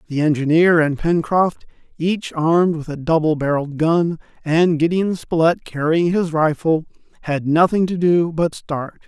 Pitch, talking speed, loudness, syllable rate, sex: 160 Hz, 150 wpm, -18 LUFS, 4.5 syllables/s, male